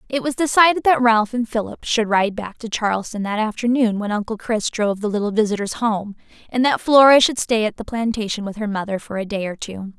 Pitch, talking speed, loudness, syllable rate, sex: 220 Hz, 230 wpm, -19 LUFS, 5.7 syllables/s, female